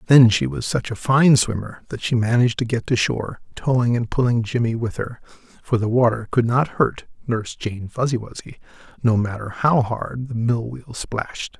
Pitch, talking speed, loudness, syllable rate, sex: 115 Hz, 190 wpm, -21 LUFS, 5.1 syllables/s, male